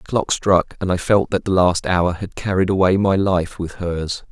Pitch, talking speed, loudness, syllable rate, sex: 95 Hz, 235 wpm, -19 LUFS, 4.6 syllables/s, male